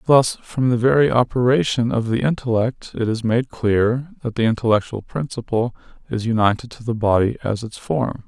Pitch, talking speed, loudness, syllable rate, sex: 120 Hz, 175 wpm, -20 LUFS, 5.1 syllables/s, male